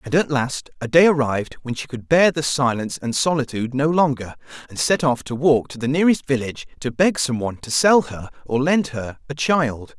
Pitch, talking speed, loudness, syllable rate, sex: 135 Hz, 215 wpm, -20 LUFS, 5.6 syllables/s, male